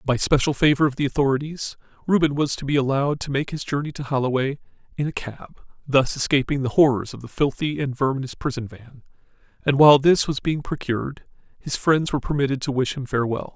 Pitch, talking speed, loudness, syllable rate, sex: 140 Hz, 200 wpm, -22 LUFS, 6.1 syllables/s, male